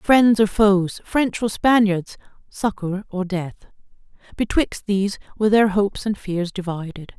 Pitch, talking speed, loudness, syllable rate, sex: 200 Hz, 135 wpm, -20 LUFS, 4.3 syllables/s, female